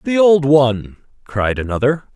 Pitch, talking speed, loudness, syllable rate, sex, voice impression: 135 Hz, 140 wpm, -15 LUFS, 4.5 syllables/s, male, masculine, very adult-like, slightly thick, cool, slightly sincere, calm, slightly elegant